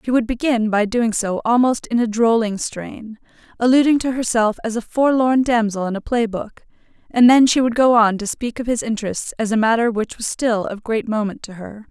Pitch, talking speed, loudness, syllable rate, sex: 230 Hz, 220 wpm, -18 LUFS, 5.2 syllables/s, female